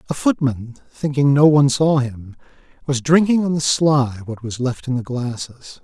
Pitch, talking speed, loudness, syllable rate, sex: 135 Hz, 185 wpm, -18 LUFS, 4.6 syllables/s, male